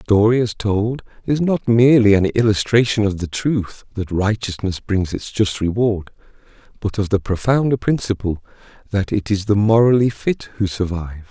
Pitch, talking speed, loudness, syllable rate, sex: 105 Hz, 165 wpm, -18 LUFS, 5.0 syllables/s, male